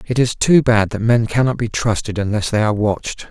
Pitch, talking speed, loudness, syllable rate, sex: 110 Hz, 235 wpm, -17 LUFS, 5.6 syllables/s, male